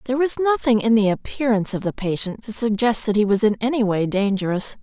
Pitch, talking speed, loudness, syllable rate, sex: 220 Hz, 225 wpm, -20 LUFS, 6.1 syllables/s, female